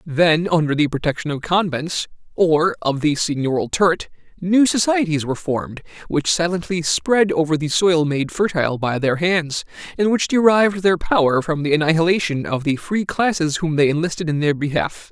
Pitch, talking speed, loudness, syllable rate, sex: 165 Hz, 175 wpm, -19 LUFS, 5.2 syllables/s, male